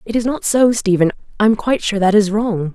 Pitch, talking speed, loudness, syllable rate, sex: 210 Hz, 240 wpm, -16 LUFS, 5.5 syllables/s, female